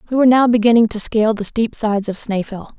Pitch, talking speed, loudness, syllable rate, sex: 220 Hz, 235 wpm, -16 LUFS, 6.8 syllables/s, female